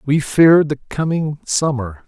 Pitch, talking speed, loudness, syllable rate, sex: 150 Hz, 145 wpm, -16 LUFS, 4.2 syllables/s, male